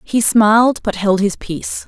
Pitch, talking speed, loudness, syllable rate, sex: 210 Hz, 190 wpm, -15 LUFS, 4.5 syllables/s, female